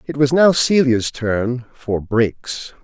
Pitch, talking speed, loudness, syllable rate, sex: 130 Hz, 150 wpm, -17 LUFS, 3.1 syllables/s, male